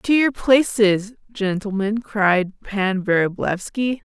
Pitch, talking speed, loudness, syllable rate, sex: 210 Hz, 100 wpm, -20 LUFS, 3.1 syllables/s, female